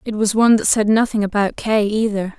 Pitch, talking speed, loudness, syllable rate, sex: 210 Hz, 225 wpm, -17 LUFS, 5.7 syllables/s, female